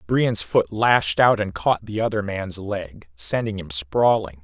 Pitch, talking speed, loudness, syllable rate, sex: 100 Hz, 175 wpm, -21 LUFS, 3.8 syllables/s, male